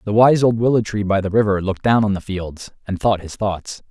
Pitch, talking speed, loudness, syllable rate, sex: 105 Hz, 260 wpm, -18 LUFS, 5.5 syllables/s, male